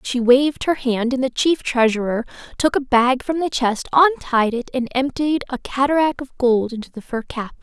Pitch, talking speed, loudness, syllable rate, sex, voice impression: 255 Hz, 205 wpm, -19 LUFS, 4.8 syllables/s, female, feminine, slightly young, slightly adult-like, tensed, bright, clear, fluent, slightly cute, friendly, unique, slightly strict, slightly intense, slightly sharp